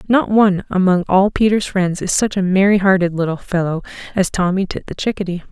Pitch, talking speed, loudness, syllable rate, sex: 190 Hz, 195 wpm, -16 LUFS, 5.7 syllables/s, female